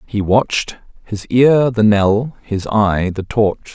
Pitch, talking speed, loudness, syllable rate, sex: 110 Hz, 145 wpm, -15 LUFS, 3.4 syllables/s, male